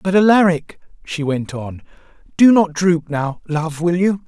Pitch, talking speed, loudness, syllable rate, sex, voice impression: 170 Hz, 155 wpm, -16 LUFS, 4.2 syllables/s, male, masculine, adult-like, sincere